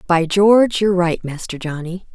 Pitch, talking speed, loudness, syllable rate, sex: 180 Hz, 170 wpm, -17 LUFS, 5.2 syllables/s, female